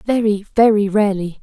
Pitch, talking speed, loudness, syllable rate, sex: 205 Hz, 125 wpm, -16 LUFS, 5.4 syllables/s, female